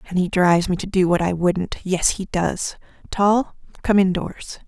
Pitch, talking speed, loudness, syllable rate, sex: 185 Hz, 180 wpm, -20 LUFS, 4.6 syllables/s, female